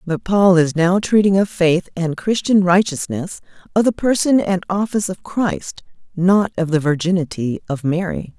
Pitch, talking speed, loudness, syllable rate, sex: 185 Hz, 165 wpm, -17 LUFS, 4.6 syllables/s, female